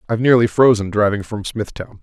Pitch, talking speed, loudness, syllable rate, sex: 110 Hz, 180 wpm, -16 LUFS, 6.0 syllables/s, male